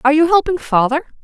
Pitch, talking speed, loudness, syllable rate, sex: 300 Hz, 195 wpm, -15 LUFS, 7.0 syllables/s, female